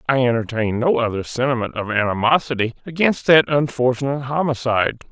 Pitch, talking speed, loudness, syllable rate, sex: 130 Hz, 130 wpm, -19 LUFS, 6.0 syllables/s, male